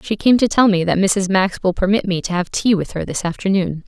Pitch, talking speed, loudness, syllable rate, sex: 190 Hz, 280 wpm, -17 LUFS, 5.7 syllables/s, female